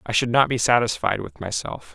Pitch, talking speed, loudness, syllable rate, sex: 120 Hz, 215 wpm, -21 LUFS, 5.4 syllables/s, male